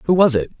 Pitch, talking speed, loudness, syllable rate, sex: 145 Hz, 300 wpm, -16 LUFS, 8.3 syllables/s, male